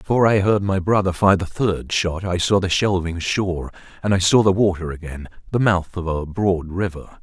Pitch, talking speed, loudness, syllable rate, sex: 95 Hz, 215 wpm, -20 LUFS, 5.2 syllables/s, male